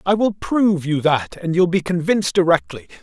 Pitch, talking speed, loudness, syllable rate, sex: 175 Hz, 200 wpm, -18 LUFS, 5.4 syllables/s, male